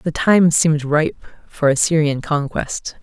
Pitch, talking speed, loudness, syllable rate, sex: 155 Hz, 140 wpm, -17 LUFS, 4.1 syllables/s, female